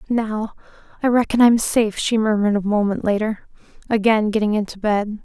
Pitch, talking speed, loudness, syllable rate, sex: 215 Hz, 160 wpm, -19 LUFS, 5.5 syllables/s, female